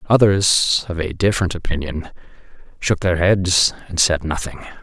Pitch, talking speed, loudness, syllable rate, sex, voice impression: 90 Hz, 135 wpm, -18 LUFS, 4.7 syllables/s, male, very masculine, very adult-like, very thick, very tensed, very powerful, very bright, soft, clear, very fluent, very cool, very intellectual, refreshing, very sincere, very calm, very mature, very friendly, very reassuring, very unique, elegant, very wild, sweet, very lively, kind, intense